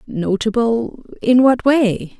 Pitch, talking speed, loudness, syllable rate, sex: 235 Hz, 80 wpm, -16 LUFS, 3.2 syllables/s, female